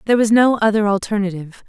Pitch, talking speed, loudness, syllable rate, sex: 210 Hz, 180 wpm, -16 LUFS, 7.4 syllables/s, female